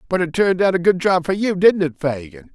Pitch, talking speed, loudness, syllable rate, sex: 175 Hz, 285 wpm, -18 LUFS, 5.9 syllables/s, male